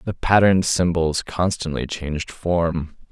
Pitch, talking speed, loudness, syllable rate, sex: 85 Hz, 115 wpm, -21 LUFS, 4.2 syllables/s, male